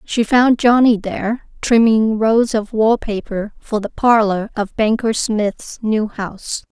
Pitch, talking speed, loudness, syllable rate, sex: 220 Hz, 150 wpm, -16 LUFS, 3.8 syllables/s, female